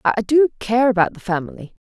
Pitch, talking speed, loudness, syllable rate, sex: 225 Hz, 190 wpm, -18 LUFS, 5.6 syllables/s, female